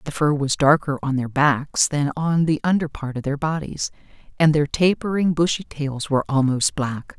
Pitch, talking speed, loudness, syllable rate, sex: 145 Hz, 190 wpm, -21 LUFS, 4.8 syllables/s, female